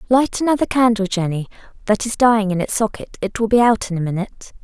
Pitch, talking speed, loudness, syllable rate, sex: 215 Hz, 195 wpm, -18 LUFS, 6.4 syllables/s, female